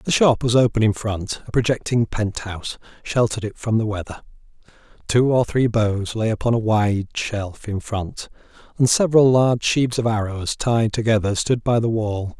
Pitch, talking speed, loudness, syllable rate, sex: 110 Hz, 180 wpm, -20 LUFS, 4.9 syllables/s, male